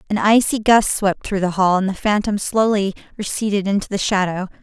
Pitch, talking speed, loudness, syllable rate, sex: 200 Hz, 195 wpm, -18 LUFS, 5.5 syllables/s, female